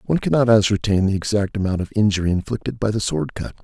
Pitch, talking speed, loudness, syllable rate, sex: 100 Hz, 215 wpm, -20 LUFS, 6.7 syllables/s, male